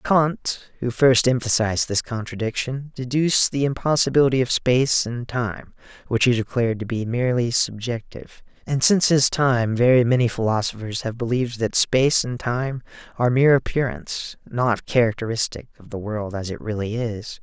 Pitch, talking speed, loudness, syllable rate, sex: 120 Hz, 155 wpm, -21 LUFS, 5.3 syllables/s, male